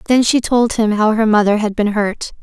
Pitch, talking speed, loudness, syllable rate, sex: 220 Hz, 245 wpm, -15 LUFS, 5.1 syllables/s, female